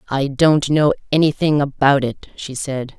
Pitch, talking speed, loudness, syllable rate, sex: 140 Hz, 160 wpm, -17 LUFS, 4.3 syllables/s, female